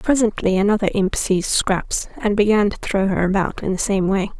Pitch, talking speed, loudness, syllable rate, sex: 200 Hz, 205 wpm, -19 LUFS, 5.4 syllables/s, female